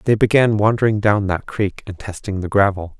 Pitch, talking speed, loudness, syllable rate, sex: 105 Hz, 200 wpm, -18 LUFS, 5.1 syllables/s, male